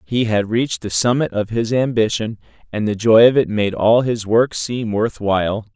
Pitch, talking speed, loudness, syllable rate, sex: 110 Hz, 210 wpm, -17 LUFS, 4.8 syllables/s, male